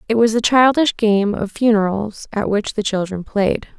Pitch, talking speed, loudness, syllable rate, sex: 215 Hz, 190 wpm, -17 LUFS, 4.6 syllables/s, female